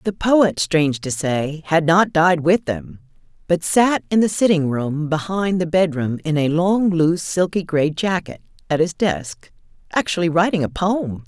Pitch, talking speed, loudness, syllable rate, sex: 170 Hz, 170 wpm, -19 LUFS, 4.4 syllables/s, female